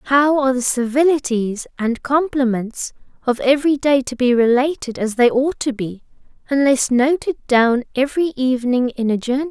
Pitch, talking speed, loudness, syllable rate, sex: 260 Hz, 160 wpm, -18 LUFS, 5.0 syllables/s, female